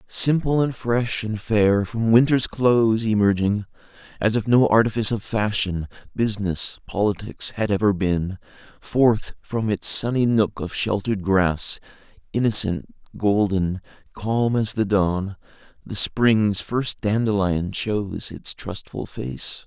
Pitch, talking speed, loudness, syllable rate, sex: 105 Hz, 125 wpm, -22 LUFS, 3.9 syllables/s, male